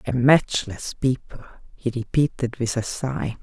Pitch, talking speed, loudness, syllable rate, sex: 125 Hz, 140 wpm, -23 LUFS, 4.1 syllables/s, female